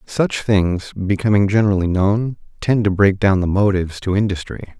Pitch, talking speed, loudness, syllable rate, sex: 100 Hz, 165 wpm, -17 LUFS, 5.1 syllables/s, male